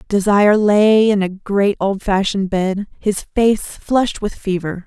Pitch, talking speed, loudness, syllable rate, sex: 200 Hz, 150 wpm, -16 LUFS, 4.3 syllables/s, female